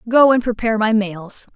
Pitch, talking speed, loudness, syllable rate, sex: 220 Hz, 195 wpm, -16 LUFS, 5.3 syllables/s, female